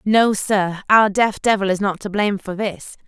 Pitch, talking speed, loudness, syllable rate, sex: 200 Hz, 215 wpm, -18 LUFS, 4.6 syllables/s, female